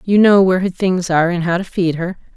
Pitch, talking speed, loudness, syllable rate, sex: 180 Hz, 280 wpm, -15 LUFS, 6.2 syllables/s, female